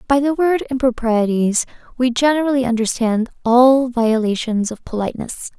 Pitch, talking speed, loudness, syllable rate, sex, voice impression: 245 Hz, 120 wpm, -17 LUFS, 4.9 syllables/s, female, very feminine, young, very thin, tensed, very bright, soft, very clear, very fluent, slightly raspy, very cute, intellectual, very refreshing, sincere, calm, very friendly, very reassuring, very unique, very elegant, slightly wild, very sweet, very lively, very kind, slightly intense, sharp, very light